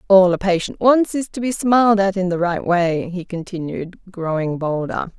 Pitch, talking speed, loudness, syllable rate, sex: 190 Hz, 195 wpm, -19 LUFS, 4.7 syllables/s, female